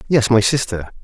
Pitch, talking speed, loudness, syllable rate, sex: 115 Hz, 175 wpm, -16 LUFS, 5.1 syllables/s, male